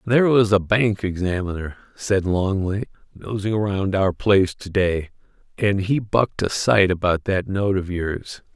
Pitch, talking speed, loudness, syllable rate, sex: 100 Hz, 160 wpm, -21 LUFS, 4.4 syllables/s, male